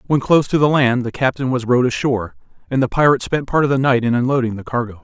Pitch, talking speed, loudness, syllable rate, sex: 130 Hz, 260 wpm, -17 LUFS, 7.1 syllables/s, male